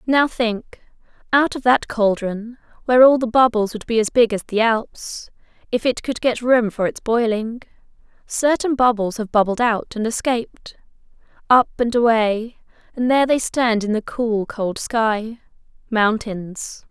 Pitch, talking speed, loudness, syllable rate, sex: 230 Hz, 155 wpm, -19 LUFS, 4.3 syllables/s, female